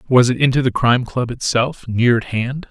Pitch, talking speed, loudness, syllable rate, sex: 125 Hz, 200 wpm, -17 LUFS, 5.2 syllables/s, male